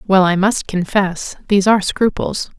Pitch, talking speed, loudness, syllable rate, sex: 195 Hz, 160 wpm, -16 LUFS, 4.8 syllables/s, female